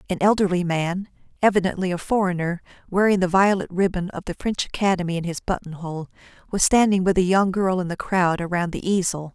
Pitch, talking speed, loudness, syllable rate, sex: 185 Hz, 185 wpm, -22 LUFS, 5.9 syllables/s, female